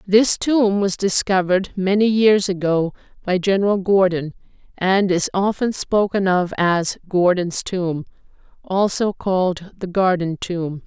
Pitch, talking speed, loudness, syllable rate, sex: 190 Hz, 125 wpm, -19 LUFS, 4.0 syllables/s, female